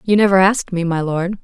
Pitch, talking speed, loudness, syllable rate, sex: 185 Hz, 250 wpm, -16 LUFS, 6.1 syllables/s, female